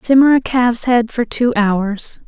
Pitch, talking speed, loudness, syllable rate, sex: 235 Hz, 185 wpm, -15 LUFS, 4.3 syllables/s, female